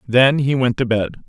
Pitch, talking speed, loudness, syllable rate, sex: 125 Hz, 235 wpm, -17 LUFS, 4.8 syllables/s, male